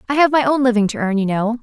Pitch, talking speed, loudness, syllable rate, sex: 240 Hz, 335 wpm, -16 LUFS, 7.0 syllables/s, female